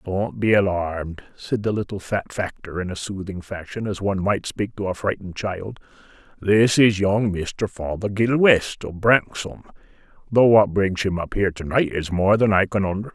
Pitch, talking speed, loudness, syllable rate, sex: 100 Hz, 185 wpm, -21 LUFS, 5.0 syllables/s, male